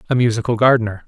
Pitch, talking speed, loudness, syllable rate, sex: 115 Hz, 170 wpm, -16 LUFS, 8.1 syllables/s, male